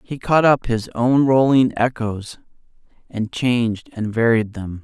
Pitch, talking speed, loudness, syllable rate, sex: 115 Hz, 150 wpm, -18 LUFS, 4.0 syllables/s, male